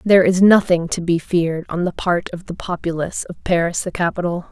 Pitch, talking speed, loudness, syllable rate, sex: 175 Hz, 215 wpm, -18 LUFS, 5.8 syllables/s, female